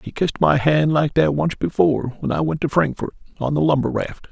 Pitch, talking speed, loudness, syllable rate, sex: 140 Hz, 235 wpm, -19 LUFS, 5.7 syllables/s, male